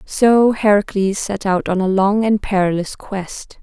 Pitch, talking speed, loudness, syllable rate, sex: 200 Hz, 165 wpm, -17 LUFS, 4.0 syllables/s, female